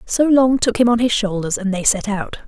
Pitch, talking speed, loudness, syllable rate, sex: 220 Hz, 265 wpm, -17 LUFS, 5.2 syllables/s, female